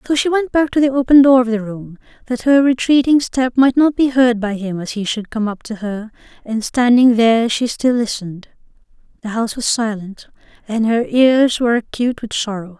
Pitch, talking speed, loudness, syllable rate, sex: 240 Hz, 210 wpm, -16 LUFS, 5.3 syllables/s, female